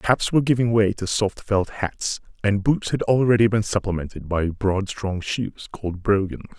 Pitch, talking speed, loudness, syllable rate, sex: 105 Hz, 180 wpm, -22 LUFS, 4.6 syllables/s, male